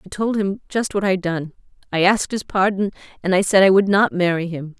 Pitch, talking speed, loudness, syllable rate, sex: 190 Hz, 240 wpm, -19 LUFS, 5.7 syllables/s, female